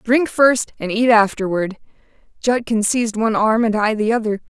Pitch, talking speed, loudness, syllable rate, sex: 225 Hz, 170 wpm, -17 LUFS, 5.2 syllables/s, female